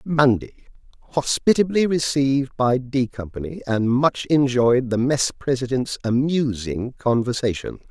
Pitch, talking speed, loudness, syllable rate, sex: 130 Hz, 100 wpm, -21 LUFS, 4.3 syllables/s, male